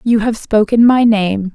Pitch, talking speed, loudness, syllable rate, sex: 220 Hz, 195 wpm, -12 LUFS, 4.1 syllables/s, female